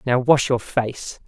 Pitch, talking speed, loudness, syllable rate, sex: 125 Hz, 190 wpm, -20 LUFS, 3.6 syllables/s, male